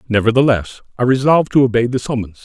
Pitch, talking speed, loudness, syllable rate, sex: 120 Hz, 170 wpm, -15 LUFS, 6.7 syllables/s, male